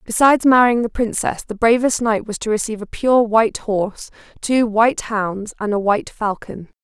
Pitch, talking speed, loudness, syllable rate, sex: 220 Hz, 185 wpm, -18 LUFS, 5.3 syllables/s, female